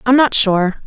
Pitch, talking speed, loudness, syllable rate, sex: 225 Hz, 210 wpm, -13 LUFS, 4.1 syllables/s, female